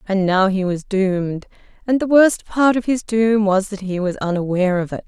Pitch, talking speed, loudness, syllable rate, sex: 200 Hz, 225 wpm, -18 LUFS, 5.1 syllables/s, female